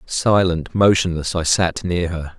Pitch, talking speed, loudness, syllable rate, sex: 85 Hz, 150 wpm, -18 LUFS, 3.9 syllables/s, male